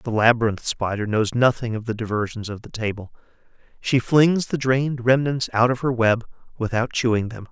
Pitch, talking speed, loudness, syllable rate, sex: 120 Hz, 185 wpm, -21 LUFS, 5.3 syllables/s, male